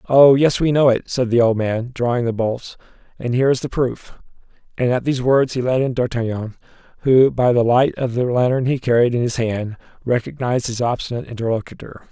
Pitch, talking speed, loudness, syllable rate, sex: 125 Hz, 205 wpm, -18 LUFS, 5.8 syllables/s, male